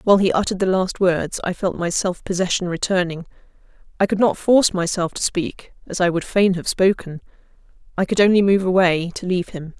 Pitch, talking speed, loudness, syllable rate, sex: 185 Hz, 195 wpm, -19 LUFS, 5.8 syllables/s, female